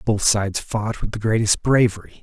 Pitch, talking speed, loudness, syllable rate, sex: 110 Hz, 190 wpm, -20 LUFS, 5.2 syllables/s, male